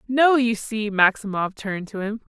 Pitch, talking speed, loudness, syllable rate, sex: 215 Hz, 180 wpm, -22 LUFS, 4.7 syllables/s, female